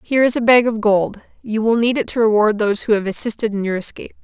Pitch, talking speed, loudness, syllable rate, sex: 220 Hz, 270 wpm, -17 LUFS, 6.7 syllables/s, female